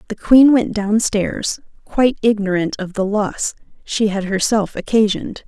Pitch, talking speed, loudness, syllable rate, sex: 210 Hz, 155 wpm, -17 LUFS, 4.5 syllables/s, female